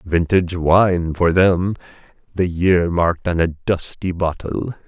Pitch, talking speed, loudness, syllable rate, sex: 90 Hz, 135 wpm, -18 LUFS, 4.0 syllables/s, male